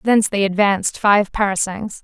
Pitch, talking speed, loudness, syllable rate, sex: 200 Hz, 145 wpm, -17 LUFS, 5.2 syllables/s, female